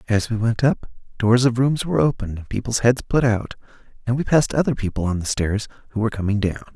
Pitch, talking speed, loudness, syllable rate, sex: 115 Hz, 230 wpm, -21 LUFS, 6.5 syllables/s, male